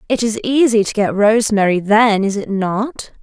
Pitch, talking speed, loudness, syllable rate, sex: 215 Hz, 185 wpm, -15 LUFS, 4.7 syllables/s, female